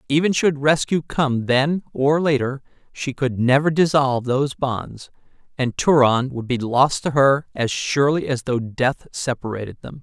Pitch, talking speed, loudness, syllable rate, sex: 135 Hz, 160 wpm, -20 LUFS, 4.5 syllables/s, male